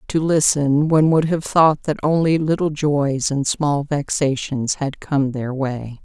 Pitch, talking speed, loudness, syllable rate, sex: 145 Hz, 170 wpm, -19 LUFS, 3.9 syllables/s, female